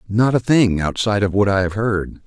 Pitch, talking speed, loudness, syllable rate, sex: 105 Hz, 240 wpm, -18 LUFS, 5.3 syllables/s, male